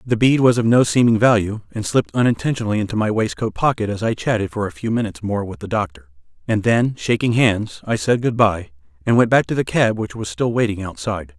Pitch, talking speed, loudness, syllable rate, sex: 110 Hz, 225 wpm, -19 LUFS, 6.0 syllables/s, male